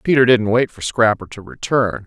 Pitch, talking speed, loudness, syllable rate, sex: 115 Hz, 205 wpm, -17 LUFS, 5.1 syllables/s, male